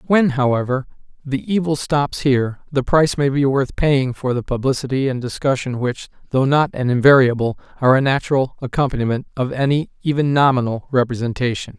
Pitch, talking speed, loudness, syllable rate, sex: 135 Hz, 160 wpm, -18 LUFS, 5.7 syllables/s, male